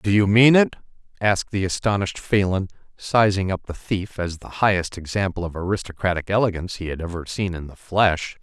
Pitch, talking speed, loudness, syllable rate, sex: 95 Hz, 185 wpm, -22 LUFS, 5.7 syllables/s, male